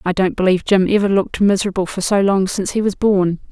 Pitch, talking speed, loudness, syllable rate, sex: 195 Hz, 240 wpm, -16 LUFS, 6.6 syllables/s, female